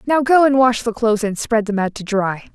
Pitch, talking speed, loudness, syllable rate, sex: 230 Hz, 280 wpm, -17 LUFS, 5.6 syllables/s, female